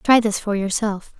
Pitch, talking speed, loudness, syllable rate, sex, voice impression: 210 Hz, 200 wpm, -20 LUFS, 4.4 syllables/s, female, very feminine, young, very thin, very tensed, slightly powerful, very bright, soft, very clear, very fluent, very cute, intellectual, very refreshing, sincere, very calm, very friendly, very reassuring, unique, elegant, slightly wild, very sweet, lively